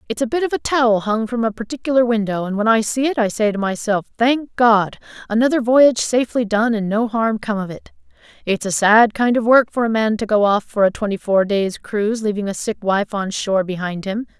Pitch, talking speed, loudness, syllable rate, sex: 220 Hz, 240 wpm, -18 LUFS, 5.6 syllables/s, female